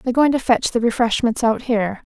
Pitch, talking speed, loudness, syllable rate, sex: 235 Hz, 230 wpm, -18 LUFS, 6.0 syllables/s, female